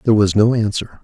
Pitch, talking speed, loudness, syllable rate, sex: 105 Hz, 230 wpm, -16 LUFS, 6.6 syllables/s, male